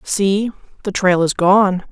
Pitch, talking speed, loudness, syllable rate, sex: 195 Hz, 155 wpm, -16 LUFS, 3.5 syllables/s, female